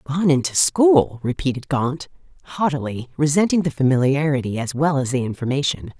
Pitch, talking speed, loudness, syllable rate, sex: 140 Hz, 140 wpm, -20 LUFS, 5.4 syllables/s, female